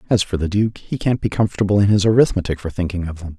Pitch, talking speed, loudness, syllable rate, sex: 100 Hz, 265 wpm, -19 LUFS, 6.9 syllables/s, male